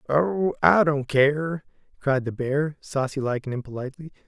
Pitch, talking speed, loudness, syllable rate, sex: 140 Hz, 155 wpm, -24 LUFS, 4.6 syllables/s, male